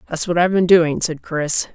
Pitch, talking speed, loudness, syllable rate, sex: 165 Hz, 240 wpm, -17 LUFS, 5.4 syllables/s, female